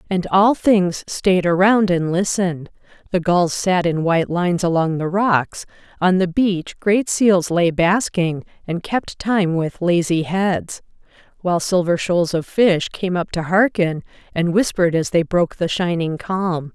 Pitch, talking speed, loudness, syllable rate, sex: 180 Hz, 165 wpm, -18 LUFS, 4.2 syllables/s, female